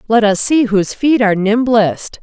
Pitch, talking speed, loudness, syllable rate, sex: 215 Hz, 190 wpm, -13 LUFS, 4.8 syllables/s, female